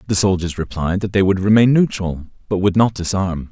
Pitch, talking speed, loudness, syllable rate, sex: 95 Hz, 205 wpm, -17 LUFS, 5.5 syllables/s, male